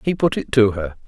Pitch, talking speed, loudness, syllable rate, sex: 115 Hz, 280 wpm, -19 LUFS, 5.6 syllables/s, male